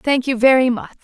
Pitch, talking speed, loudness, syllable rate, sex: 255 Hz, 235 wpm, -15 LUFS, 5.7 syllables/s, female